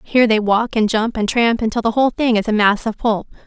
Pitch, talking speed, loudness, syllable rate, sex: 225 Hz, 275 wpm, -17 LUFS, 5.9 syllables/s, female